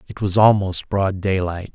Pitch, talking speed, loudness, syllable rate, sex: 95 Hz, 170 wpm, -19 LUFS, 4.4 syllables/s, male